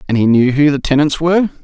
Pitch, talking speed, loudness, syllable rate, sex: 145 Hz, 255 wpm, -13 LUFS, 6.6 syllables/s, male